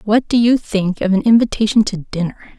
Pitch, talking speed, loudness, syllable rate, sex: 210 Hz, 210 wpm, -16 LUFS, 5.7 syllables/s, female